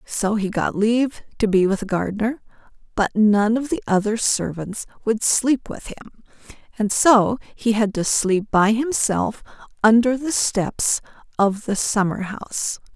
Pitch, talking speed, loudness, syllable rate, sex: 215 Hz, 155 wpm, -20 LUFS, 4.2 syllables/s, female